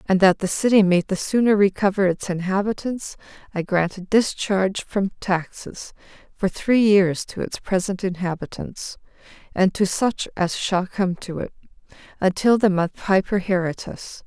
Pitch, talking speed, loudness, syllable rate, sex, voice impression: 195 Hz, 145 wpm, -21 LUFS, 4.6 syllables/s, female, feminine, adult-like, tensed, slightly soft, clear, slightly raspy, intellectual, calm, reassuring, elegant, kind, modest